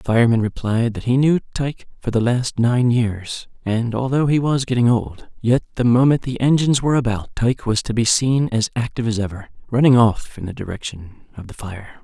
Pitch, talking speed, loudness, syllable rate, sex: 120 Hz, 210 wpm, -19 LUFS, 5.6 syllables/s, male